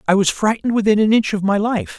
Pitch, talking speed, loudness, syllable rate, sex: 205 Hz, 270 wpm, -17 LUFS, 6.6 syllables/s, male